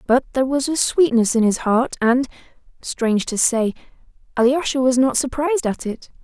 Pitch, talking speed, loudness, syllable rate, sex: 255 Hz, 175 wpm, -19 LUFS, 5.3 syllables/s, female